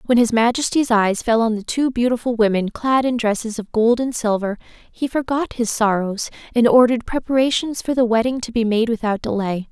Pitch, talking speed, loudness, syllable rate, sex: 230 Hz, 200 wpm, -19 LUFS, 5.4 syllables/s, female